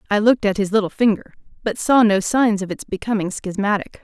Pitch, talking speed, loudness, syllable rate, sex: 210 Hz, 210 wpm, -19 LUFS, 6.0 syllables/s, female